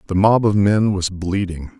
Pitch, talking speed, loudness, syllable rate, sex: 95 Hz, 200 wpm, -18 LUFS, 4.4 syllables/s, male